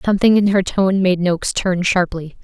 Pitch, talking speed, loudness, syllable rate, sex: 185 Hz, 195 wpm, -16 LUFS, 5.3 syllables/s, female